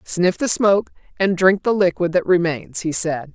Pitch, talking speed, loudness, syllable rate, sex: 180 Hz, 195 wpm, -18 LUFS, 4.7 syllables/s, female